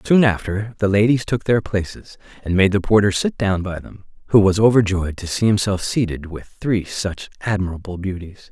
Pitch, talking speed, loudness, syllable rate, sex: 100 Hz, 190 wpm, -19 LUFS, 5.1 syllables/s, male